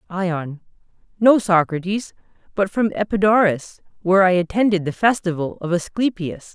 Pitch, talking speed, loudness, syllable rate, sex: 190 Hz, 120 wpm, -19 LUFS, 4.9 syllables/s, male